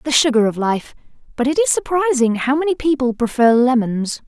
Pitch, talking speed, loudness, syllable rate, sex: 260 Hz, 185 wpm, -17 LUFS, 5.4 syllables/s, female